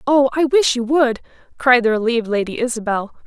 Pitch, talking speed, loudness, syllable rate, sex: 245 Hz, 185 wpm, -17 LUFS, 5.7 syllables/s, female